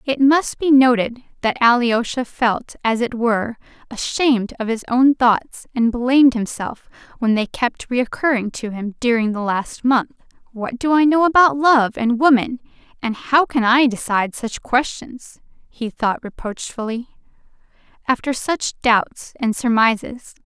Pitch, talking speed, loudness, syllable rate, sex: 245 Hz, 150 wpm, -18 LUFS, 4.3 syllables/s, female